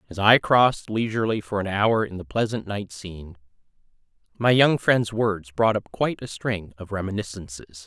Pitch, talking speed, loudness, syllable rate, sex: 105 Hz, 175 wpm, -23 LUFS, 5.0 syllables/s, male